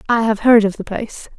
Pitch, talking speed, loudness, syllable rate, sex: 220 Hz, 260 wpm, -16 LUFS, 6.1 syllables/s, female